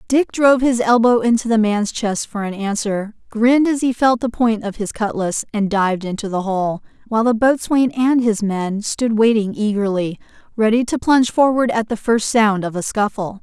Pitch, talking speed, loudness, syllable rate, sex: 220 Hz, 200 wpm, -17 LUFS, 5.0 syllables/s, female